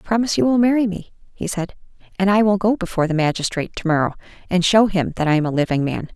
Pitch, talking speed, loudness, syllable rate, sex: 185 Hz, 245 wpm, -19 LUFS, 7.1 syllables/s, female